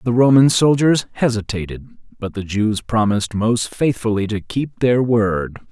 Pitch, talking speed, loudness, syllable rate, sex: 115 Hz, 145 wpm, -18 LUFS, 4.5 syllables/s, male